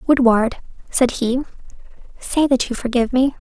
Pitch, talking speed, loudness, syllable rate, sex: 250 Hz, 140 wpm, -18 LUFS, 4.9 syllables/s, female